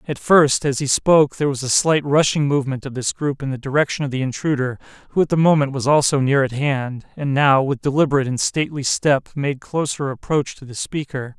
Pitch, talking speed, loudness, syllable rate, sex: 140 Hz, 220 wpm, -19 LUFS, 5.8 syllables/s, male